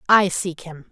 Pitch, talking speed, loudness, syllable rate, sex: 175 Hz, 195 wpm, -20 LUFS, 4.2 syllables/s, female